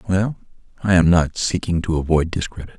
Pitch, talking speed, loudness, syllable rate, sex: 90 Hz, 170 wpm, -19 LUFS, 5.6 syllables/s, male